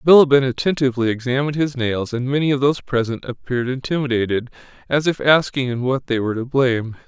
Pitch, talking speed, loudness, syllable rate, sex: 130 Hz, 180 wpm, -19 LUFS, 6.4 syllables/s, male